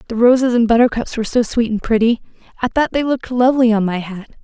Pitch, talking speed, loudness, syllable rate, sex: 235 Hz, 230 wpm, -16 LUFS, 6.5 syllables/s, female